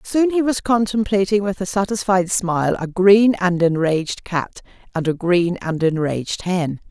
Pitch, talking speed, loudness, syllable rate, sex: 185 Hz, 165 wpm, -19 LUFS, 4.6 syllables/s, female